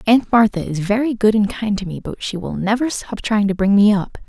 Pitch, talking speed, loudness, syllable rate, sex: 210 Hz, 265 wpm, -18 LUFS, 5.6 syllables/s, female